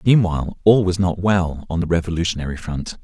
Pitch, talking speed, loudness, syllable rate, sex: 90 Hz, 180 wpm, -19 LUFS, 5.7 syllables/s, male